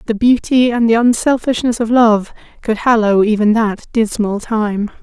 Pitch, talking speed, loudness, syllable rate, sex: 225 Hz, 155 wpm, -14 LUFS, 4.5 syllables/s, female